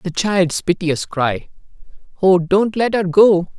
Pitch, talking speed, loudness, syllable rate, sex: 185 Hz, 150 wpm, -16 LUFS, 3.6 syllables/s, male